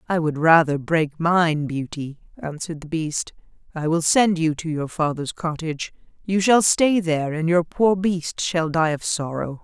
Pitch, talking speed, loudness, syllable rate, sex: 165 Hz, 180 wpm, -21 LUFS, 4.4 syllables/s, female